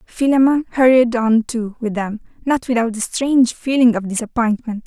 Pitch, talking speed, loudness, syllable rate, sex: 235 Hz, 160 wpm, -17 LUFS, 5.1 syllables/s, female